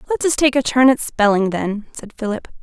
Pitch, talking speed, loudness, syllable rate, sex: 240 Hz, 230 wpm, -17 LUFS, 5.3 syllables/s, female